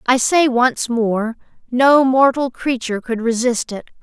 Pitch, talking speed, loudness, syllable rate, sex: 245 Hz, 150 wpm, -16 LUFS, 4.1 syllables/s, female